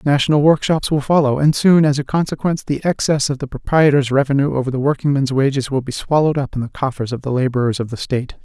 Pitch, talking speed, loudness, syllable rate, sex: 140 Hz, 225 wpm, -17 LUFS, 6.6 syllables/s, male